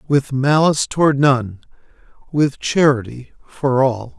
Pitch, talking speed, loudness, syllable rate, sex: 135 Hz, 115 wpm, -17 LUFS, 4.3 syllables/s, male